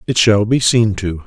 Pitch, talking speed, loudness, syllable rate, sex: 105 Hz, 235 wpm, -14 LUFS, 4.5 syllables/s, male